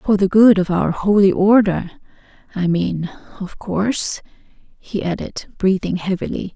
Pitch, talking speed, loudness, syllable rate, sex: 190 Hz, 135 wpm, -17 LUFS, 4.4 syllables/s, female